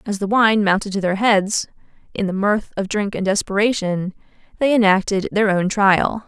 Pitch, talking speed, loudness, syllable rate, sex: 205 Hz, 180 wpm, -18 LUFS, 4.8 syllables/s, female